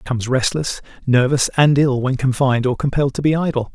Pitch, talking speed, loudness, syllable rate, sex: 135 Hz, 210 wpm, -18 LUFS, 6.4 syllables/s, male